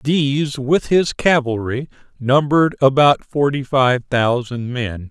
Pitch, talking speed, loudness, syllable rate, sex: 135 Hz, 120 wpm, -17 LUFS, 3.9 syllables/s, male